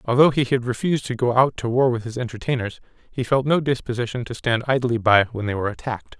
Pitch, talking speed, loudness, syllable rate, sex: 120 Hz, 230 wpm, -21 LUFS, 6.4 syllables/s, male